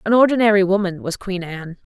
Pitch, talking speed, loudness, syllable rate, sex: 195 Hz, 190 wpm, -18 LUFS, 6.4 syllables/s, female